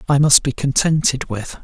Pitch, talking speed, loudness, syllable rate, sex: 135 Hz, 185 wpm, -16 LUFS, 4.8 syllables/s, male